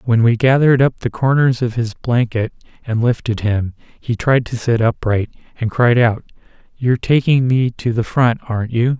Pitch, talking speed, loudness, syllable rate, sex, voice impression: 120 Hz, 185 wpm, -16 LUFS, 4.8 syllables/s, male, masculine, very adult-like, slightly middle-aged, very thick, relaxed, weak, slightly dark, hard, slightly muffled, fluent, very cool, very intellectual, very sincere, very calm, mature, friendly, reassuring, very elegant, very sweet, very kind, slightly modest